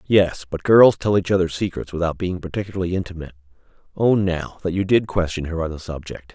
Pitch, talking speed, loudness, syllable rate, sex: 90 Hz, 200 wpm, -20 LUFS, 6.0 syllables/s, male